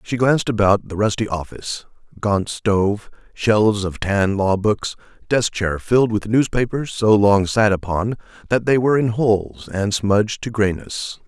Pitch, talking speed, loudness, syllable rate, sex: 105 Hz, 160 wpm, -19 LUFS, 4.7 syllables/s, male